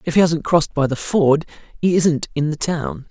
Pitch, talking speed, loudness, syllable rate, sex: 155 Hz, 230 wpm, -18 LUFS, 5.0 syllables/s, male